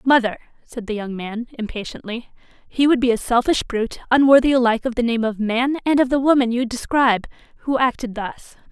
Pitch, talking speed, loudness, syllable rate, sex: 240 Hz, 195 wpm, -19 LUFS, 5.9 syllables/s, female